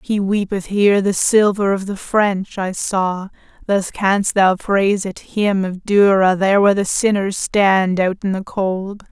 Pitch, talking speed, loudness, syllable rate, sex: 195 Hz, 180 wpm, -17 LUFS, 4.1 syllables/s, female